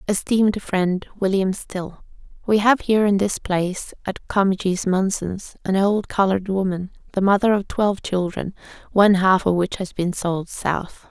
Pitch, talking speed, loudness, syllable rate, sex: 195 Hz, 150 wpm, -21 LUFS, 4.8 syllables/s, female